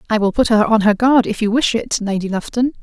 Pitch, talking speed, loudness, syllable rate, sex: 220 Hz, 275 wpm, -16 LUFS, 5.9 syllables/s, female